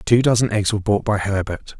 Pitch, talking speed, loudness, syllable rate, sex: 105 Hz, 235 wpm, -19 LUFS, 5.9 syllables/s, male